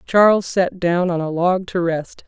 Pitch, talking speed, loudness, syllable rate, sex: 180 Hz, 210 wpm, -18 LUFS, 4.2 syllables/s, female